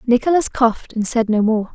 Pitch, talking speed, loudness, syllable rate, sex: 235 Hz, 205 wpm, -17 LUFS, 5.6 syllables/s, female